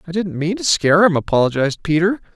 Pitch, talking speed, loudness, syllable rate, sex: 170 Hz, 205 wpm, -17 LUFS, 6.7 syllables/s, male